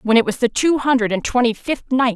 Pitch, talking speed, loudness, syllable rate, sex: 245 Hz, 280 wpm, -18 LUFS, 5.6 syllables/s, female